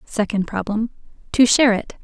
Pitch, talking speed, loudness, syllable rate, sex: 220 Hz, 145 wpm, -19 LUFS, 5.4 syllables/s, female